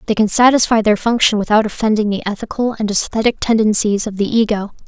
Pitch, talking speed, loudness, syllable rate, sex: 215 Hz, 185 wpm, -15 LUFS, 6.1 syllables/s, female